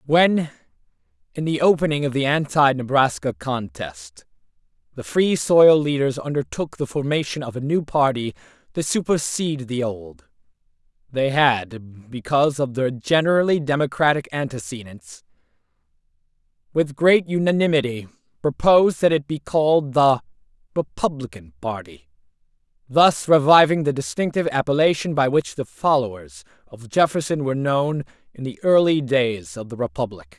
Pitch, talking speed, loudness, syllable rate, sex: 140 Hz, 125 wpm, -20 LUFS, 4.9 syllables/s, male